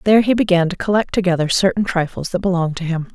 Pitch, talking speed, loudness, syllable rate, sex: 185 Hz, 230 wpm, -17 LUFS, 7.0 syllables/s, female